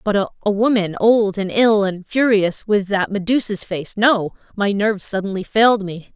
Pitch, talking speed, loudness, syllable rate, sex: 205 Hz, 145 wpm, -18 LUFS, 4.6 syllables/s, female